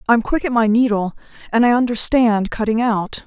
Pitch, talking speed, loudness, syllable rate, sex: 230 Hz, 200 wpm, -17 LUFS, 5.5 syllables/s, female